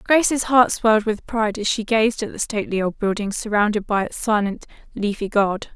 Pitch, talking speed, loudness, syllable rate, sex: 215 Hz, 200 wpm, -20 LUFS, 5.5 syllables/s, female